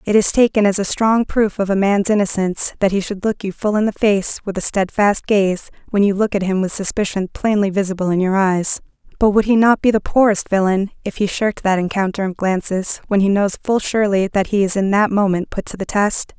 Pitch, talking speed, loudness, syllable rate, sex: 200 Hz, 240 wpm, -17 LUFS, 5.6 syllables/s, female